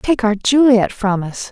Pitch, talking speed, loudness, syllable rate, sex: 225 Hz, 200 wpm, -15 LUFS, 4.1 syllables/s, female